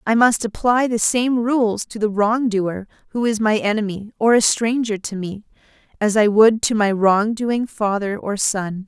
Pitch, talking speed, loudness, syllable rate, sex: 215 Hz, 195 wpm, -18 LUFS, 4.3 syllables/s, female